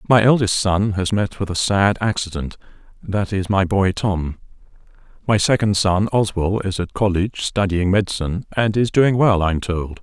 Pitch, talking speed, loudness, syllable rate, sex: 100 Hz, 175 wpm, -19 LUFS, 4.9 syllables/s, male